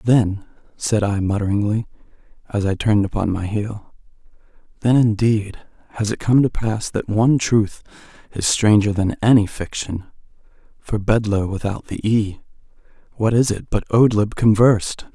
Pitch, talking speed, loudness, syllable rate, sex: 105 Hz, 140 wpm, -19 LUFS, 4.7 syllables/s, male